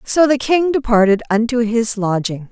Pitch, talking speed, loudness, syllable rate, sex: 235 Hz, 165 wpm, -16 LUFS, 4.7 syllables/s, female